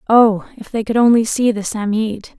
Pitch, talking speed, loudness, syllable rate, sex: 220 Hz, 200 wpm, -16 LUFS, 4.8 syllables/s, female